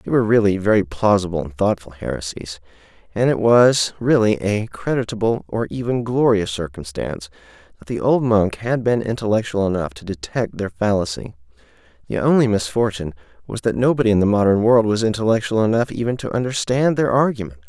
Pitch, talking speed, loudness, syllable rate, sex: 105 Hz, 165 wpm, -19 LUFS, 5.7 syllables/s, male